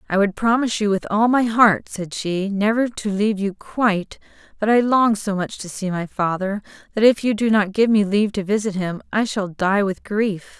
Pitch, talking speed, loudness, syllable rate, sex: 205 Hz, 225 wpm, -20 LUFS, 5.0 syllables/s, female